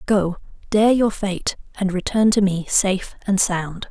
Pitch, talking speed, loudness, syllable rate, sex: 195 Hz, 170 wpm, -20 LUFS, 4.2 syllables/s, female